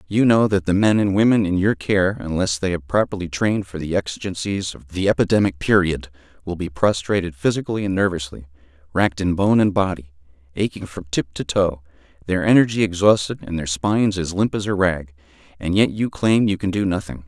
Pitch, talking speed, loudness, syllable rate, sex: 90 Hz, 200 wpm, -20 LUFS, 5.7 syllables/s, male